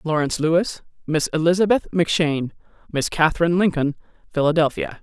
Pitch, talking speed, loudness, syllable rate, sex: 160 Hz, 105 wpm, -20 LUFS, 6.5 syllables/s, female